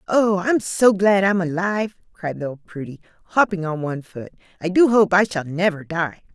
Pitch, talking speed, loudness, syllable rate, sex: 185 Hz, 190 wpm, -20 LUFS, 5.3 syllables/s, female